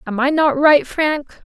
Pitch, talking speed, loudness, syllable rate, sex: 280 Hz, 200 wpm, -16 LUFS, 3.8 syllables/s, female